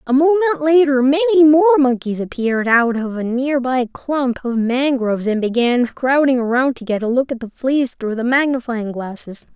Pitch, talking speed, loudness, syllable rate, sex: 260 Hz, 190 wpm, -17 LUFS, 4.8 syllables/s, female